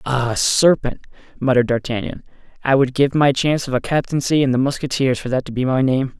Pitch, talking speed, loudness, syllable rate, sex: 130 Hz, 205 wpm, -18 LUFS, 6.1 syllables/s, male